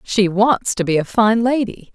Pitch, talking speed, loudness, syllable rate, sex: 210 Hz, 215 wpm, -17 LUFS, 4.4 syllables/s, female